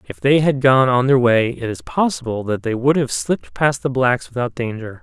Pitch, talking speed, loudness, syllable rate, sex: 125 Hz, 240 wpm, -18 LUFS, 5.1 syllables/s, male